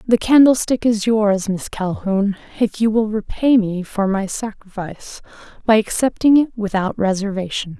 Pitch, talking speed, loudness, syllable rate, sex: 210 Hz, 140 wpm, -18 LUFS, 4.6 syllables/s, female